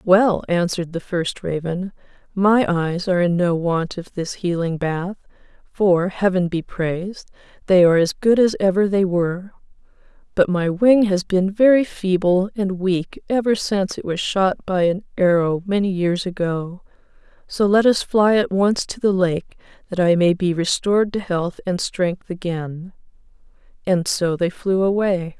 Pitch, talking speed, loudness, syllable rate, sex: 185 Hz, 170 wpm, -19 LUFS, 4.4 syllables/s, female